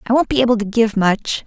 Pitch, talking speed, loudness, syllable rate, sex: 230 Hz, 285 wpm, -16 LUFS, 5.9 syllables/s, female